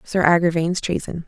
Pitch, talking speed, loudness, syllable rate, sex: 170 Hz, 140 wpm, -20 LUFS, 5.1 syllables/s, female